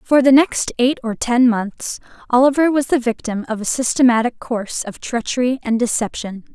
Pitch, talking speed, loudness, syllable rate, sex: 245 Hz, 175 wpm, -17 LUFS, 5.1 syllables/s, female